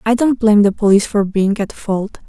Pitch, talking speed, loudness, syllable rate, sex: 210 Hz, 235 wpm, -15 LUFS, 5.7 syllables/s, female